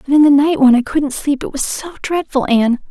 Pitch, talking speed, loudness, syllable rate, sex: 280 Hz, 250 wpm, -15 LUFS, 5.7 syllables/s, female